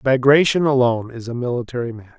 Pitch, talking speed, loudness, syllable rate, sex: 125 Hz, 165 wpm, -18 LUFS, 6.3 syllables/s, male